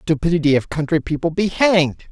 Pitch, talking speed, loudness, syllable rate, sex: 165 Hz, 170 wpm, -18 LUFS, 6.1 syllables/s, male